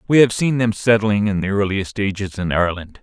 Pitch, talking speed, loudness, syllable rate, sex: 105 Hz, 220 wpm, -18 LUFS, 5.6 syllables/s, male